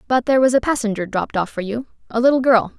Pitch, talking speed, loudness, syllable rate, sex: 235 Hz, 235 wpm, -18 LUFS, 7.2 syllables/s, female